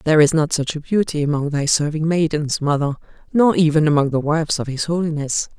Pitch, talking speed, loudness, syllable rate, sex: 155 Hz, 205 wpm, -18 LUFS, 6.0 syllables/s, female